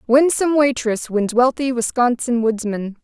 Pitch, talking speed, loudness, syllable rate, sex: 245 Hz, 120 wpm, -18 LUFS, 4.6 syllables/s, female